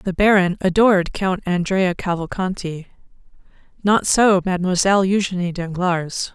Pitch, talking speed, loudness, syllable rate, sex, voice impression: 185 Hz, 105 wpm, -19 LUFS, 4.8 syllables/s, female, feminine, adult-like, relaxed, clear, fluent, intellectual, calm, friendly, lively, slightly sharp